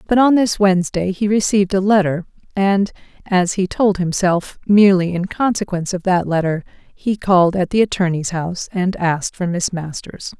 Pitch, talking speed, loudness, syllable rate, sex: 190 Hz, 160 wpm, -17 LUFS, 5.3 syllables/s, female